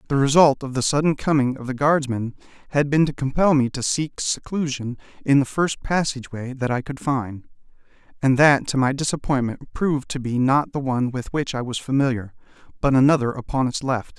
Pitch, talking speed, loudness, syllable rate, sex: 135 Hz, 195 wpm, -21 LUFS, 5.5 syllables/s, male